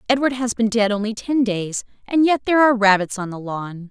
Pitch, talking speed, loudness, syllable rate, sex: 225 Hz, 230 wpm, -19 LUFS, 5.8 syllables/s, female